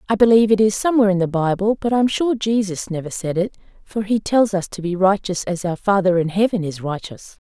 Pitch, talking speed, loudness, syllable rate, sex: 200 Hz, 240 wpm, -19 LUFS, 6.1 syllables/s, female